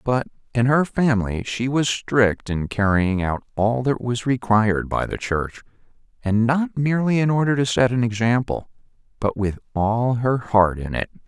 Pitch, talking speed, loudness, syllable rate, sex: 120 Hz, 170 wpm, -21 LUFS, 4.6 syllables/s, male